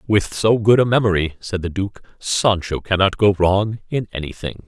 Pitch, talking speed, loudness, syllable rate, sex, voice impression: 100 Hz, 180 wpm, -18 LUFS, 4.8 syllables/s, male, very masculine, very middle-aged, very thick, tensed, very powerful, bright, soft, muffled, fluent, very cool, very intellectual, very sincere, very calm, very mature, friendly, reassuring, very unique, slightly elegant, wild, sweet, very lively, very kind, slightly modest